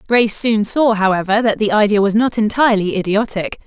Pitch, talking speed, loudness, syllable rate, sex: 210 Hz, 180 wpm, -15 LUFS, 5.8 syllables/s, female